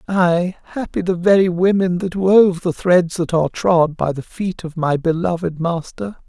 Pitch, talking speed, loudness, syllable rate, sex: 175 Hz, 180 wpm, -17 LUFS, 4.4 syllables/s, male